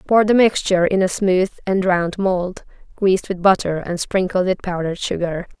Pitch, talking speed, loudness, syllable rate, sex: 185 Hz, 180 wpm, -18 LUFS, 5.0 syllables/s, female